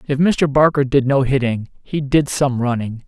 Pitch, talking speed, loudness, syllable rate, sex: 135 Hz, 195 wpm, -17 LUFS, 4.6 syllables/s, male